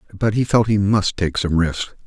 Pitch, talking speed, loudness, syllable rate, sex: 100 Hz, 230 wpm, -19 LUFS, 4.9 syllables/s, male